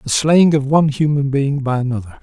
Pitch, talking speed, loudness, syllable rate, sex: 140 Hz, 215 wpm, -16 LUFS, 5.5 syllables/s, male